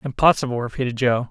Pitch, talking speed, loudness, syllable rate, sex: 125 Hz, 140 wpm, -21 LUFS, 6.6 syllables/s, male